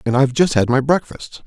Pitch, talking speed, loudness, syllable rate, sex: 135 Hz, 245 wpm, -16 LUFS, 6.0 syllables/s, male